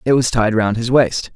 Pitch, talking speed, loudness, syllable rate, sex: 115 Hz, 265 wpm, -16 LUFS, 4.9 syllables/s, male